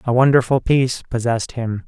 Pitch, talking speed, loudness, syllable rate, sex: 125 Hz, 160 wpm, -18 LUFS, 5.9 syllables/s, male